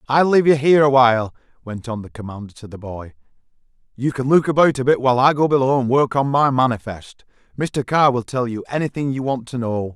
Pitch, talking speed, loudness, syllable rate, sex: 130 Hz, 230 wpm, -18 LUFS, 6.1 syllables/s, male